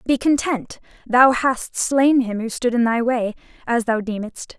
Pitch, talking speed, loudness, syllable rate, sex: 245 Hz, 185 wpm, -19 LUFS, 4.1 syllables/s, female